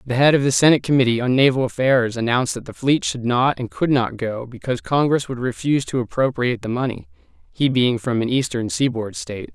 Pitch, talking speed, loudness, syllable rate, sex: 125 Hz, 205 wpm, -20 LUFS, 6.0 syllables/s, male